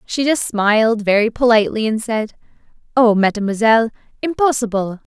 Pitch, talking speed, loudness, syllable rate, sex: 225 Hz, 115 wpm, -16 LUFS, 5.5 syllables/s, female